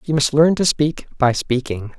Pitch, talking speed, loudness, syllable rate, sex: 140 Hz, 210 wpm, -18 LUFS, 4.6 syllables/s, male